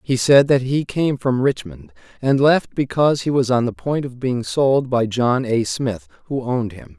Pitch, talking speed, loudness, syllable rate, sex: 125 Hz, 215 wpm, -19 LUFS, 4.5 syllables/s, male